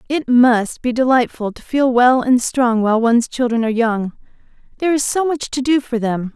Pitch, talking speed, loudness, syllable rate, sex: 245 Hz, 210 wpm, -16 LUFS, 5.3 syllables/s, female